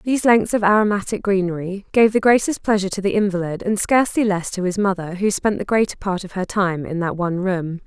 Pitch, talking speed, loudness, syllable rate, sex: 195 Hz, 230 wpm, -19 LUFS, 5.9 syllables/s, female